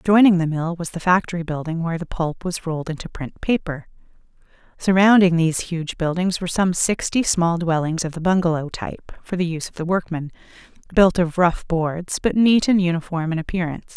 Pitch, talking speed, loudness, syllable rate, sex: 170 Hz, 190 wpm, -20 LUFS, 5.7 syllables/s, female